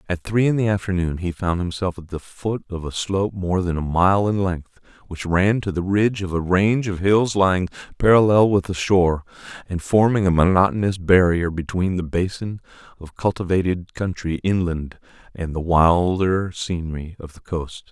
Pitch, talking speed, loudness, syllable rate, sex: 90 Hz, 180 wpm, -20 LUFS, 5.0 syllables/s, male